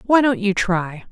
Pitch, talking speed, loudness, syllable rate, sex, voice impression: 210 Hz, 215 wpm, -19 LUFS, 4.1 syllables/s, female, very feminine, adult-like, slightly intellectual, friendly, slightly reassuring, slightly elegant